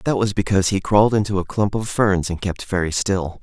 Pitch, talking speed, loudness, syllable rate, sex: 100 Hz, 245 wpm, -20 LUFS, 5.7 syllables/s, male